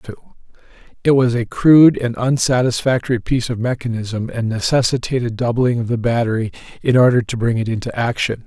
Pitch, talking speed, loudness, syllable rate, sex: 120 Hz, 165 wpm, -17 LUFS, 6.1 syllables/s, male